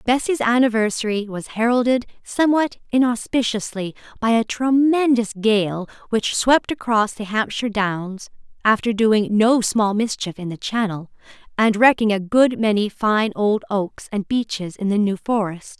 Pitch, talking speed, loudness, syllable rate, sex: 220 Hz, 145 wpm, -20 LUFS, 4.5 syllables/s, female